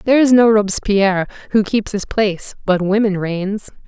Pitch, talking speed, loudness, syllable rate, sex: 205 Hz, 170 wpm, -16 LUFS, 5.1 syllables/s, female